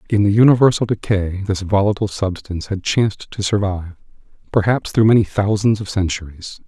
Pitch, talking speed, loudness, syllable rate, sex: 100 Hz, 155 wpm, -18 LUFS, 5.8 syllables/s, male